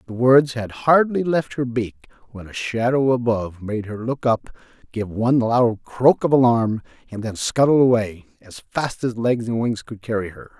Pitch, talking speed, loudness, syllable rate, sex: 120 Hz, 195 wpm, -20 LUFS, 4.7 syllables/s, male